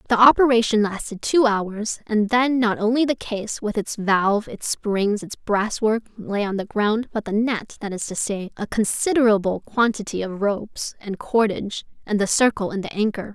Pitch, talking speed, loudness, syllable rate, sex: 215 Hz, 190 wpm, -21 LUFS, 4.8 syllables/s, female